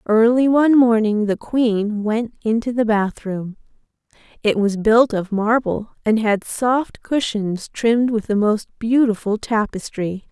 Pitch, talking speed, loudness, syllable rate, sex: 220 Hz, 140 wpm, -19 LUFS, 4.0 syllables/s, female